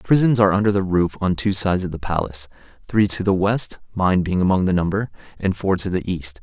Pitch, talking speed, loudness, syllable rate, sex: 95 Hz, 245 wpm, -20 LUFS, 5.4 syllables/s, male